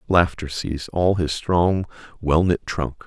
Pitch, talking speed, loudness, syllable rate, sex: 85 Hz, 135 wpm, -22 LUFS, 4.2 syllables/s, male